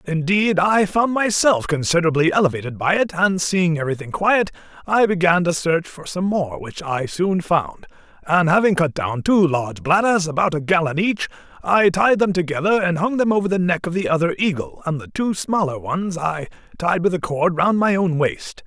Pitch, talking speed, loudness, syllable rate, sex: 175 Hz, 200 wpm, -19 LUFS, 5.0 syllables/s, male